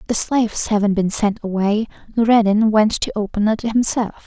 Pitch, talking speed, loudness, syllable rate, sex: 215 Hz, 170 wpm, -18 LUFS, 5.3 syllables/s, female